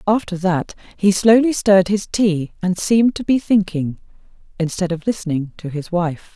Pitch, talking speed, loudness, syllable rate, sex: 190 Hz, 170 wpm, -18 LUFS, 4.9 syllables/s, female